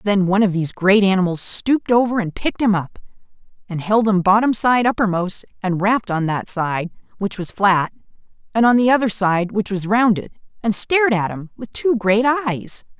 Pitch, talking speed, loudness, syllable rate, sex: 205 Hz, 195 wpm, -18 LUFS, 5.4 syllables/s, female